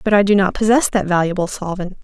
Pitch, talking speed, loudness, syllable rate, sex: 195 Hz, 235 wpm, -17 LUFS, 6.3 syllables/s, female